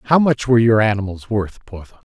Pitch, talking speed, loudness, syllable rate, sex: 110 Hz, 200 wpm, -17 LUFS, 5.8 syllables/s, male